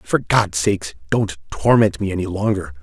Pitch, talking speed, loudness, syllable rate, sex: 95 Hz, 190 wpm, -19 LUFS, 5.4 syllables/s, male